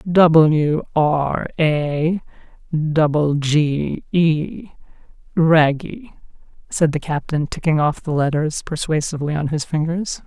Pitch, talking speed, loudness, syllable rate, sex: 155 Hz, 100 wpm, -19 LUFS, 3.4 syllables/s, female